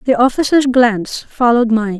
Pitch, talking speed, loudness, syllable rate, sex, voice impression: 240 Hz, 150 wpm, -13 LUFS, 5.4 syllables/s, female, very feminine, very young, slightly adult-like, very thin, slightly relaxed, slightly weak, bright, slightly clear, fluent, cute, slightly intellectual, slightly calm, slightly reassuring, unique, slightly elegant, slightly sweet, kind, modest